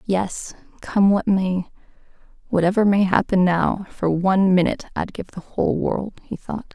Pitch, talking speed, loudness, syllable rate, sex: 190 Hz, 150 wpm, -20 LUFS, 4.8 syllables/s, female